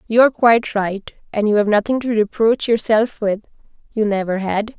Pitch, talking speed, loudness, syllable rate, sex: 215 Hz, 150 wpm, -17 LUFS, 5.0 syllables/s, female